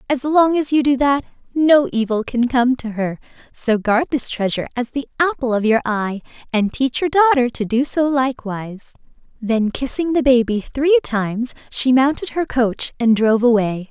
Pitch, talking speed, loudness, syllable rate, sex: 250 Hz, 185 wpm, -18 LUFS, 5.0 syllables/s, female